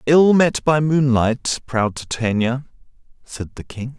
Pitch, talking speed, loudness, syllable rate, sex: 130 Hz, 135 wpm, -18 LUFS, 3.7 syllables/s, male